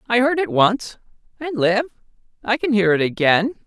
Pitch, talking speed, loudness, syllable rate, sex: 215 Hz, 165 wpm, -18 LUFS, 4.9 syllables/s, male